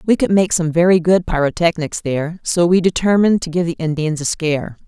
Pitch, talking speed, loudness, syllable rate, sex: 170 Hz, 210 wpm, -16 LUFS, 5.8 syllables/s, female